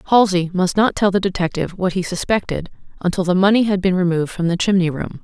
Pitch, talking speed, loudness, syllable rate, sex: 185 Hz, 220 wpm, -18 LUFS, 6.5 syllables/s, female